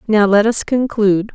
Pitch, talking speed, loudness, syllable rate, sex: 215 Hz, 180 wpm, -14 LUFS, 5.0 syllables/s, female